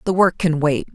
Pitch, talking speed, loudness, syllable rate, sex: 165 Hz, 255 wpm, -18 LUFS, 5.1 syllables/s, female